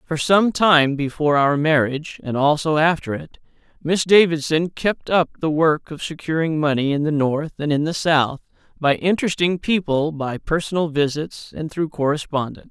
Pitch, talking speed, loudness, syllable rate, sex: 155 Hz, 165 wpm, -20 LUFS, 4.9 syllables/s, male